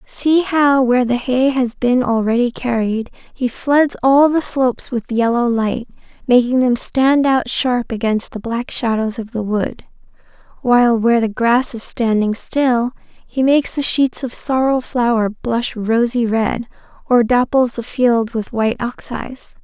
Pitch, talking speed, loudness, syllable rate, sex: 245 Hz, 160 wpm, -17 LUFS, 4.2 syllables/s, female